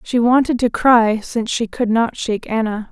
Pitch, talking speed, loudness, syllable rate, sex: 230 Hz, 205 wpm, -17 LUFS, 5.0 syllables/s, female